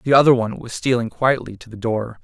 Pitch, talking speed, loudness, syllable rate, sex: 120 Hz, 240 wpm, -19 LUFS, 5.9 syllables/s, male